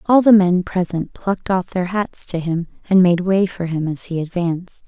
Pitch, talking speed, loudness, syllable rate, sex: 180 Hz, 220 wpm, -18 LUFS, 4.9 syllables/s, female